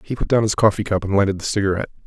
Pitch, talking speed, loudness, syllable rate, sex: 100 Hz, 290 wpm, -19 LUFS, 8.3 syllables/s, male